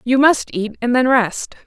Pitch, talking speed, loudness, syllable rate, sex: 245 Hz, 180 wpm, -16 LUFS, 4.2 syllables/s, female